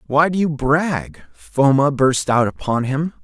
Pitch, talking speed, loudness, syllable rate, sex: 140 Hz, 165 wpm, -18 LUFS, 3.9 syllables/s, male